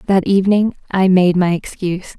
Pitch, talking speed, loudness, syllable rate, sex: 185 Hz, 165 wpm, -15 LUFS, 5.4 syllables/s, female